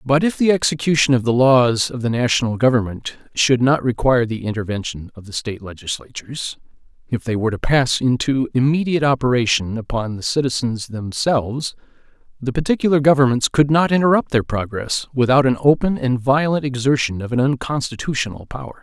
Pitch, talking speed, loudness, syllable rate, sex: 130 Hz, 160 wpm, -18 LUFS, 5.7 syllables/s, male